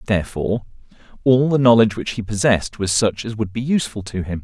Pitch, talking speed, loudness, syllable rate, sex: 110 Hz, 205 wpm, -19 LUFS, 6.6 syllables/s, male